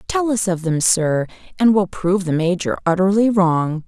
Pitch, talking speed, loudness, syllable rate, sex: 185 Hz, 185 wpm, -18 LUFS, 4.8 syllables/s, female